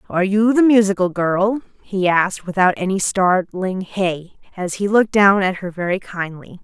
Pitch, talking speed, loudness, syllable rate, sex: 190 Hz, 170 wpm, -18 LUFS, 4.9 syllables/s, female